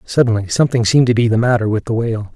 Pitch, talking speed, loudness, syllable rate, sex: 115 Hz, 255 wpm, -15 LUFS, 7.6 syllables/s, male